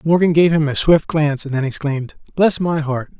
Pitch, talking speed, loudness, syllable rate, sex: 155 Hz, 225 wpm, -17 LUFS, 5.6 syllables/s, male